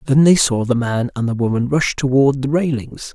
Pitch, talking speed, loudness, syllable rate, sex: 130 Hz, 230 wpm, -17 LUFS, 5.1 syllables/s, male